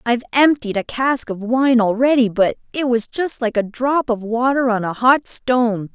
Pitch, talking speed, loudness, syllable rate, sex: 240 Hz, 210 wpm, -18 LUFS, 4.7 syllables/s, female